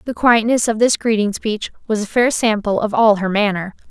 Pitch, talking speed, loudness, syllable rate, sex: 215 Hz, 215 wpm, -17 LUFS, 5.2 syllables/s, female